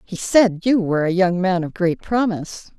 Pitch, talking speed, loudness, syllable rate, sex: 190 Hz, 215 wpm, -19 LUFS, 4.9 syllables/s, female